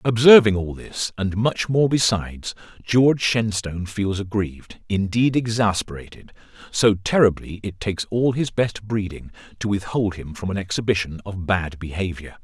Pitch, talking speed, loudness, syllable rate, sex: 100 Hz, 135 wpm, -21 LUFS, 4.8 syllables/s, male